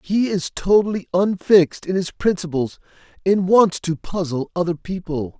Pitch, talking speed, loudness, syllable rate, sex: 180 Hz, 145 wpm, -20 LUFS, 4.7 syllables/s, male